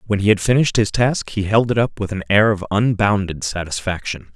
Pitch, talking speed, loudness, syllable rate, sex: 100 Hz, 220 wpm, -18 LUFS, 5.7 syllables/s, male